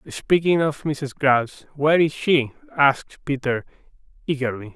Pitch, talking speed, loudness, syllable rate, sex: 145 Hz, 125 wpm, -21 LUFS, 4.7 syllables/s, male